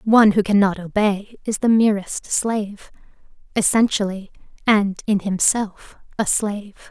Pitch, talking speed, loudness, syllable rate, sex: 205 Hz, 120 wpm, -19 LUFS, 4.5 syllables/s, female